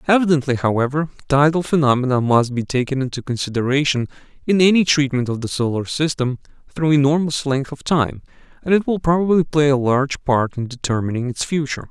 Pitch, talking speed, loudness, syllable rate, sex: 140 Hz, 165 wpm, -18 LUFS, 5.9 syllables/s, male